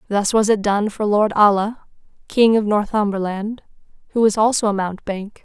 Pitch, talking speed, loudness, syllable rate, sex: 210 Hz, 165 wpm, -18 LUFS, 5.1 syllables/s, female